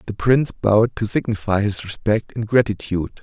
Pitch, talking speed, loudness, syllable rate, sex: 105 Hz, 165 wpm, -20 LUFS, 5.5 syllables/s, male